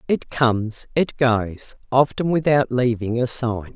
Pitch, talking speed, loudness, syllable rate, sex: 125 Hz, 145 wpm, -20 LUFS, 3.9 syllables/s, female